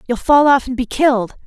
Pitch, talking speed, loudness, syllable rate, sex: 255 Hz, 245 wpm, -15 LUFS, 5.7 syllables/s, female